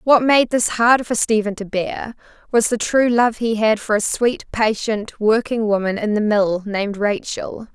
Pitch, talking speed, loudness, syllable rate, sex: 220 Hz, 195 wpm, -18 LUFS, 4.5 syllables/s, female